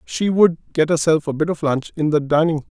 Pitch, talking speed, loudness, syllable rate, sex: 160 Hz, 260 wpm, -18 LUFS, 6.0 syllables/s, male